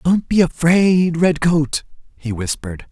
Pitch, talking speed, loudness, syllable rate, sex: 160 Hz, 125 wpm, -17 LUFS, 4.0 syllables/s, male